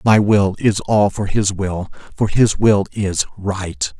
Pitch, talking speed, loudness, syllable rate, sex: 100 Hz, 180 wpm, -17 LUFS, 3.6 syllables/s, male